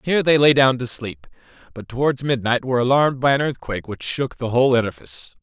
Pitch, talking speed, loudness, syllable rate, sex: 130 Hz, 210 wpm, -19 LUFS, 6.4 syllables/s, male